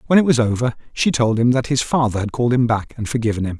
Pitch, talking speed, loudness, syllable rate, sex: 120 Hz, 285 wpm, -18 LUFS, 6.8 syllables/s, male